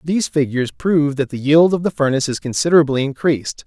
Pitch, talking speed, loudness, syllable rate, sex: 145 Hz, 195 wpm, -17 LUFS, 6.7 syllables/s, male